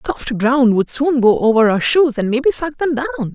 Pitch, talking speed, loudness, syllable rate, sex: 255 Hz, 250 wpm, -15 LUFS, 5.4 syllables/s, female